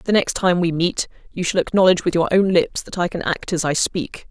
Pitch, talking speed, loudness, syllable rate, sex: 180 Hz, 265 wpm, -19 LUFS, 5.6 syllables/s, female